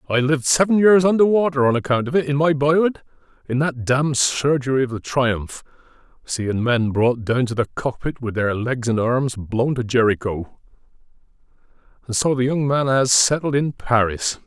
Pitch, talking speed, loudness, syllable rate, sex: 130 Hz, 175 wpm, -19 LUFS, 5.0 syllables/s, male